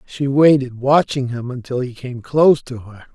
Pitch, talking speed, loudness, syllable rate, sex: 130 Hz, 190 wpm, -17 LUFS, 4.7 syllables/s, male